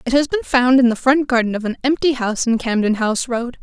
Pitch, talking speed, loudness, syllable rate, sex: 245 Hz, 265 wpm, -17 LUFS, 6.1 syllables/s, female